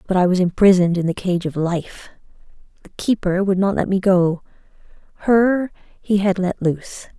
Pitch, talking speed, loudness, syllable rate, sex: 190 Hz, 165 wpm, -18 LUFS, 5.0 syllables/s, female